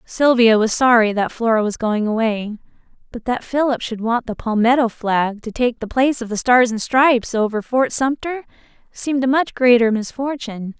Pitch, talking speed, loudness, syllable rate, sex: 235 Hz, 185 wpm, -18 LUFS, 5.1 syllables/s, female